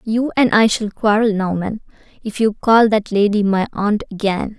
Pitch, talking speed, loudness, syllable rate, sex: 210 Hz, 185 wpm, -16 LUFS, 4.5 syllables/s, female